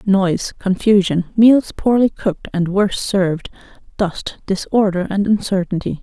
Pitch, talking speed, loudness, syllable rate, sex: 195 Hz, 120 wpm, -17 LUFS, 4.7 syllables/s, female